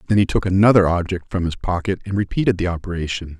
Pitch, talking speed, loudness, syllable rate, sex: 95 Hz, 210 wpm, -19 LUFS, 6.7 syllables/s, male